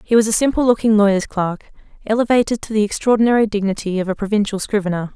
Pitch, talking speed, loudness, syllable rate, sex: 210 Hz, 185 wpm, -17 LUFS, 6.8 syllables/s, female